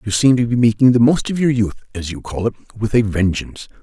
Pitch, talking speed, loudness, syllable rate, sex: 115 Hz, 265 wpm, -17 LUFS, 5.6 syllables/s, male